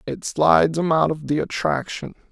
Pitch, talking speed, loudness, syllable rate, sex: 140 Hz, 180 wpm, -20 LUFS, 4.9 syllables/s, male